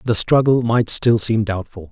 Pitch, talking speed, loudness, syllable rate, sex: 110 Hz, 190 wpm, -17 LUFS, 4.6 syllables/s, male